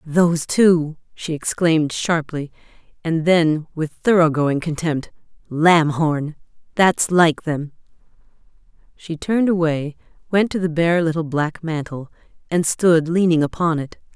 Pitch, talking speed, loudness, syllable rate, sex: 160 Hz, 125 wpm, -19 LUFS, 4.1 syllables/s, female